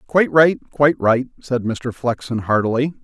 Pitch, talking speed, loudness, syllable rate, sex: 130 Hz, 140 wpm, -18 LUFS, 4.9 syllables/s, male